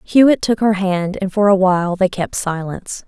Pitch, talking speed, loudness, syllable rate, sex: 190 Hz, 215 wpm, -16 LUFS, 5.1 syllables/s, female